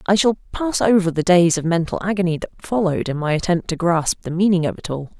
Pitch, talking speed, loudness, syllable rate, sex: 180 Hz, 245 wpm, -19 LUFS, 6.0 syllables/s, female